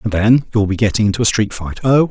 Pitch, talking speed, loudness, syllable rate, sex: 110 Hz, 255 wpm, -15 LUFS, 6.4 syllables/s, male